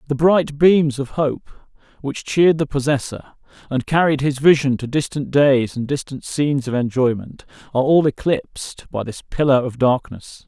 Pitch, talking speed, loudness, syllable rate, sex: 140 Hz, 165 wpm, -18 LUFS, 4.7 syllables/s, male